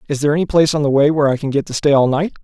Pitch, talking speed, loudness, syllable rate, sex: 145 Hz, 370 wpm, -15 LUFS, 8.8 syllables/s, male